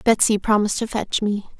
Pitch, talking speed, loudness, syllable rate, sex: 210 Hz, 190 wpm, -20 LUFS, 5.8 syllables/s, female